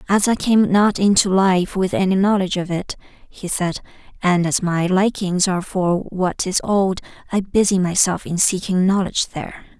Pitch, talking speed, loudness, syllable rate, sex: 185 Hz, 180 wpm, -18 LUFS, 4.8 syllables/s, female